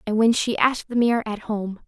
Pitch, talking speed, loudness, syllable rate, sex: 220 Hz, 255 wpm, -22 LUFS, 6.0 syllables/s, female